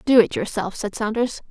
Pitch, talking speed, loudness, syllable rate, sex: 225 Hz, 200 wpm, -22 LUFS, 5.3 syllables/s, female